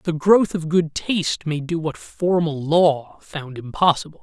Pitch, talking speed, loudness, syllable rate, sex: 155 Hz, 170 wpm, -20 LUFS, 4.2 syllables/s, male